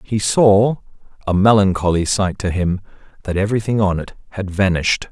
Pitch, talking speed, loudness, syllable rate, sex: 100 Hz, 130 wpm, -17 LUFS, 5.3 syllables/s, male